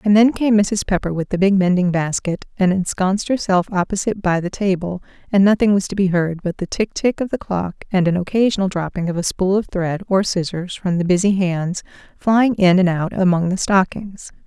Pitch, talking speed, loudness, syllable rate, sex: 190 Hz, 215 wpm, -18 LUFS, 5.4 syllables/s, female